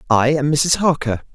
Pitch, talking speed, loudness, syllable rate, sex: 140 Hz, 180 wpm, -17 LUFS, 4.7 syllables/s, male